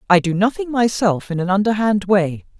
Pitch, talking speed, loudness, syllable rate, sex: 200 Hz, 185 wpm, -18 LUFS, 5.2 syllables/s, female